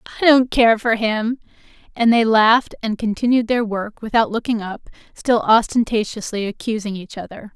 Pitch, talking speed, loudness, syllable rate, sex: 225 Hz, 160 wpm, -18 LUFS, 5.2 syllables/s, female